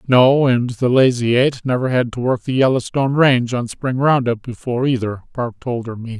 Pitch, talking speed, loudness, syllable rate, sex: 125 Hz, 205 wpm, -17 LUFS, 5.6 syllables/s, male